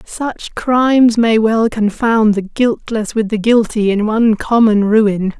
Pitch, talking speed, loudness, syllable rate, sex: 220 Hz, 155 wpm, -14 LUFS, 3.8 syllables/s, female